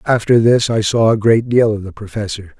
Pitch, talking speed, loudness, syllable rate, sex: 110 Hz, 230 wpm, -14 LUFS, 5.2 syllables/s, male